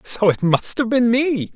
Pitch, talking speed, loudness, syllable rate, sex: 225 Hz, 230 wpm, -18 LUFS, 4.1 syllables/s, male